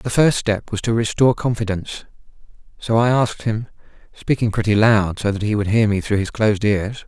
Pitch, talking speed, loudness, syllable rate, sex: 110 Hz, 205 wpm, -19 LUFS, 5.6 syllables/s, male